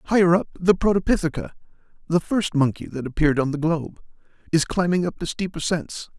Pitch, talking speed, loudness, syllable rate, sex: 170 Hz, 155 wpm, -22 LUFS, 5.9 syllables/s, male